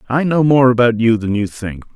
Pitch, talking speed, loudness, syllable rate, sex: 120 Hz, 245 wpm, -14 LUFS, 5.4 syllables/s, male